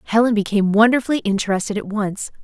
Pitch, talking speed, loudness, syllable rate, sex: 210 Hz, 150 wpm, -18 LUFS, 6.9 syllables/s, female